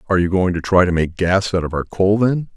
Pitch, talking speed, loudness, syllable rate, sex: 95 Hz, 305 wpm, -17 LUFS, 6.0 syllables/s, male